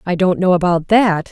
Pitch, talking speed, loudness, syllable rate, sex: 180 Hz, 230 wpm, -14 LUFS, 5.0 syllables/s, female